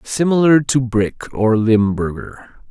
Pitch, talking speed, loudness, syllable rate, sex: 120 Hz, 110 wpm, -16 LUFS, 3.8 syllables/s, male